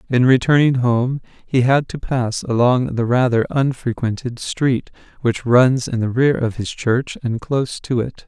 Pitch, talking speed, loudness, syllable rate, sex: 125 Hz, 175 wpm, -18 LUFS, 4.3 syllables/s, male